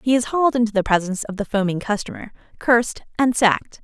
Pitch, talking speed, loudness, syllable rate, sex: 220 Hz, 205 wpm, -20 LUFS, 6.7 syllables/s, female